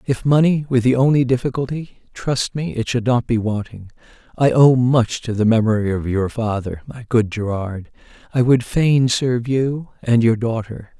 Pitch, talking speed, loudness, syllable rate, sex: 120 Hz, 175 wpm, -18 LUFS, 4.8 syllables/s, male